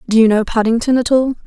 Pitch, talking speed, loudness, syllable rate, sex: 235 Hz, 245 wpm, -14 LUFS, 6.6 syllables/s, female